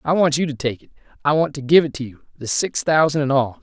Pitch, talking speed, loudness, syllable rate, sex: 140 Hz, 300 wpm, -19 LUFS, 6.3 syllables/s, male